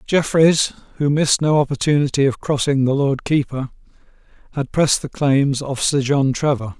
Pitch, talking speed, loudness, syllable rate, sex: 140 Hz, 160 wpm, -18 LUFS, 5.1 syllables/s, male